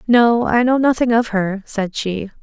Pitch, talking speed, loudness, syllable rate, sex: 225 Hz, 200 wpm, -17 LUFS, 4.2 syllables/s, female